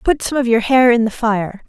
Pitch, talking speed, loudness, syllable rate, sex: 235 Hz, 285 wpm, -15 LUFS, 5.2 syllables/s, female